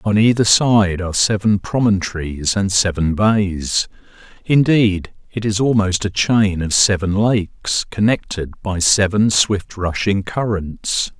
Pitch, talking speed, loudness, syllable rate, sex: 100 Hz, 130 wpm, -17 LUFS, 3.9 syllables/s, male